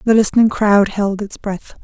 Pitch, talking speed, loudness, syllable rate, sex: 205 Hz, 195 wpm, -16 LUFS, 4.8 syllables/s, female